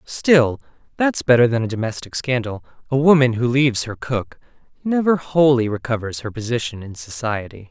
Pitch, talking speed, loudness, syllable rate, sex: 125 Hz, 155 wpm, -19 LUFS, 5.2 syllables/s, male